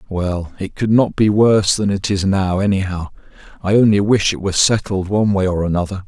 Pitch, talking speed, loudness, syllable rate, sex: 100 Hz, 210 wpm, -16 LUFS, 5.5 syllables/s, male